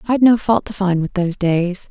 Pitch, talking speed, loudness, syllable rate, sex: 195 Hz, 250 wpm, -17 LUFS, 5.1 syllables/s, female